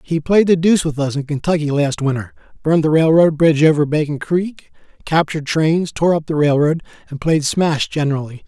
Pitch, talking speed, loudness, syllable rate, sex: 155 Hz, 190 wpm, -16 LUFS, 5.6 syllables/s, male